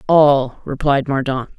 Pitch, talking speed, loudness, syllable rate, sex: 140 Hz, 115 wpm, -17 LUFS, 3.8 syllables/s, male